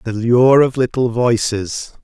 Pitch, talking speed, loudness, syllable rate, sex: 120 Hz, 145 wpm, -15 LUFS, 3.8 syllables/s, male